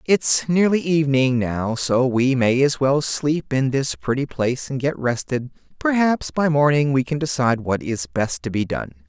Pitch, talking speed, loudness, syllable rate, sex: 135 Hz, 190 wpm, -20 LUFS, 4.6 syllables/s, male